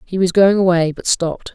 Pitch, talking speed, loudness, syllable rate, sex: 180 Hz, 235 wpm, -15 LUFS, 5.7 syllables/s, female